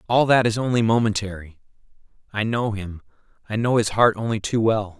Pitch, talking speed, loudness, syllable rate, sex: 110 Hz, 180 wpm, -21 LUFS, 5.5 syllables/s, male